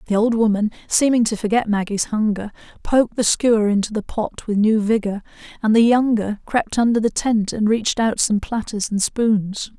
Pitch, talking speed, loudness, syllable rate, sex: 220 Hz, 190 wpm, -19 LUFS, 5.1 syllables/s, female